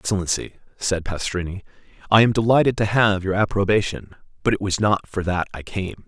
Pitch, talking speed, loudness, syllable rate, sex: 100 Hz, 180 wpm, -21 LUFS, 5.7 syllables/s, male